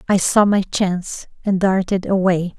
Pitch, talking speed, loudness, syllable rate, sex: 190 Hz, 160 wpm, -18 LUFS, 4.5 syllables/s, female